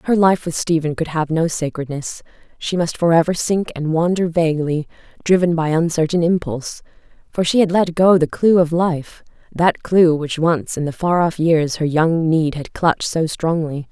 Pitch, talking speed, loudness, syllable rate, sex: 165 Hz, 185 wpm, -18 LUFS, 4.8 syllables/s, female